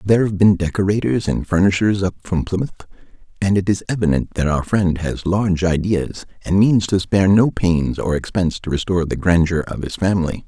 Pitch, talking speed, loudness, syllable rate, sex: 95 Hz, 195 wpm, -18 LUFS, 5.6 syllables/s, male